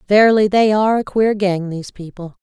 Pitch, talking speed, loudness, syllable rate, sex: 200 Hz, 200 wpm, -15 LUFS, 5.9 syllables/s, female